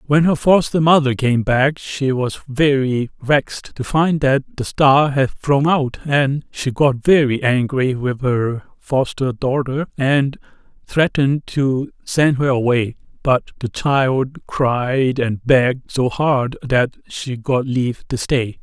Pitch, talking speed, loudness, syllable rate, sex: 135 Hz, 150 wpm, -18 LUFS, 3.6 syllables/s, male